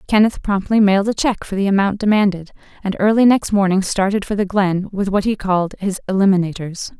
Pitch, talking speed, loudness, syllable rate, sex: 195 Hz, 195 wpm, -17 LUFS, 5.9 syllables/s, female